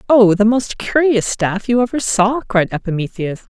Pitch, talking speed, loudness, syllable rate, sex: 215 Hz, 170 wpm, -16 LUFS, 4.6 syllables/s, female